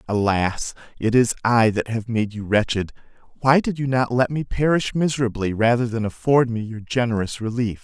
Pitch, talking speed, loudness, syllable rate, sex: 115 Hz, 185 wpm, -21 LUFS, 5.2 syllables/s, male